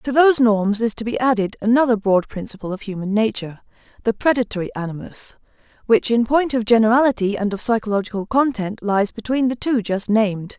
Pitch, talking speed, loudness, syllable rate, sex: 220 Hz, 165 wpm, -19 LUFS, 5.9 syllables/s, female